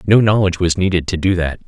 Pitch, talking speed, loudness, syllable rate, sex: 90 Hz, 250 wpm, -16 LUFS, 6.8 syllables/s, male